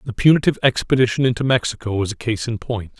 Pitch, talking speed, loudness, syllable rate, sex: 115 Hz, 200 wpm, -19 LUFS, 6.9 syllables/s, male